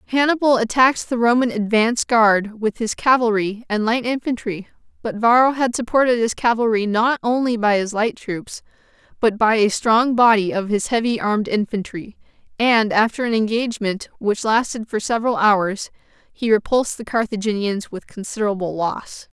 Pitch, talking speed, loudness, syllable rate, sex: 225 Hz, 155 wpm, -19 LUFS, 5.1 syllables/s, female